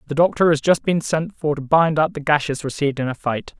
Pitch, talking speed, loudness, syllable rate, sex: 150 Hz, 265 wpm, -19 LUFS, 6.0 syllables/s, male